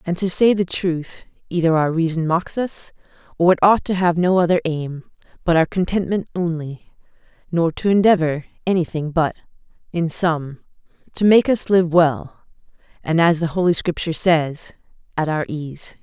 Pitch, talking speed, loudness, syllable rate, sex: 170 Hz, 160 wpm, -19 LUFS, 4.8 syllables/s, female